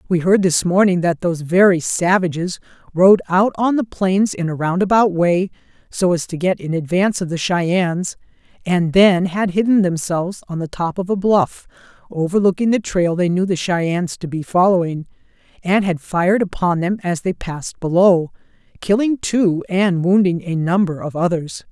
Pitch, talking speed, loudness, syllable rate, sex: 180 Hz, 175 wpm, -17 LUFS, 4.9 syllables/s, female